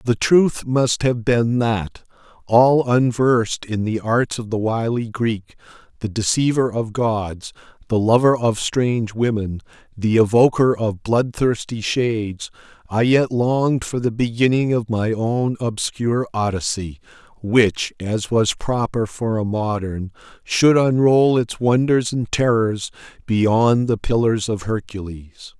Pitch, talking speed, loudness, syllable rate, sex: 115 Hz, 135 wpm, -19 LUFS, 3.9 syllables/s, male